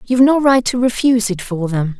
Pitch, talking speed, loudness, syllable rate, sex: 225 Hz, 240 wpm, -15 LUFS, 5.8 syllables/s, female